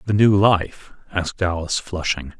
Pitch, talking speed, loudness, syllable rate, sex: 90 Hz, 150 wpm, -20 LUFS, 5.0 syllables/s, male